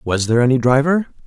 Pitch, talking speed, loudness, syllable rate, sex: 135 Hz, 190 wpm, -16 LUFS, 6.9 syllables/s, male